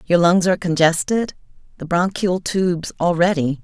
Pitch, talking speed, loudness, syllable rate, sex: 175 Hz, 130 wpm, -18 LUFS, 5.0 syllables/s, female